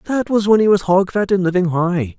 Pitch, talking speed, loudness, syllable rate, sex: 190 Hz, 275 wpm, -16 LUFS, 5.5 syllables/s, male